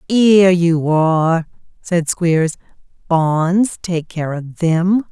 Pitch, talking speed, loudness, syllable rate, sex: 170 Hz, 105 wpm, -16 LUFS, 3.0 syllables/s, female